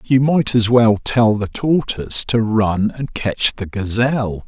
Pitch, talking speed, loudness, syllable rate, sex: 115 Hz, 175 wpm, -16 LUFS, 3.9 syllables/s, male